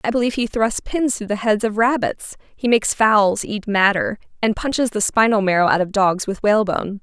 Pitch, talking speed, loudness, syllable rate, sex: 210 Hz, 215 wpm, -18 LUFS, 5.5 syllables/s, female